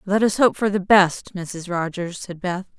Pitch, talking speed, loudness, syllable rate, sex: 185 Hz, 215 wpm, -21 LUFS, 4.4 syllables/s, female